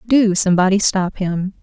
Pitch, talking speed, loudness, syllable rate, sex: 195 Hz, 150 wpm, -16 LUFS, 4.8 syllables/s, female